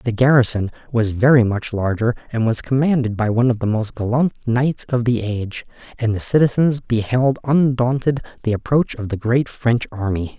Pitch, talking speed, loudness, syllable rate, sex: 120 Hz, 180 wpm, -18 LUFS, 5.1 syllables/s, male